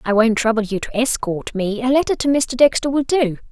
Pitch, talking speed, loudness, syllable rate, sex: 240 Hz, 240 wpm, -18 LUFS, 5.4 syllables/s, female